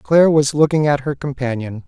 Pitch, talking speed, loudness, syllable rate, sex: 140 Hz, 190 wpm, -17 LUFS, 5.5 syllables/s, male